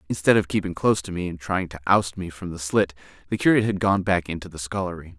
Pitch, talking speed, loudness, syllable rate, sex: 90 Hz, 255 wpm, -23 LUFS, 6.5 syllables/s, male